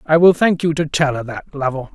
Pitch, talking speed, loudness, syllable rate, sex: 150 Hz, 275 wpm, -17 LUFS, 5.4 syllables/s, male